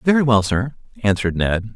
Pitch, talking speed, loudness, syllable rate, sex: 115 Hz, 170 wpm, -19 LUFS, 5.7 syllables/s, male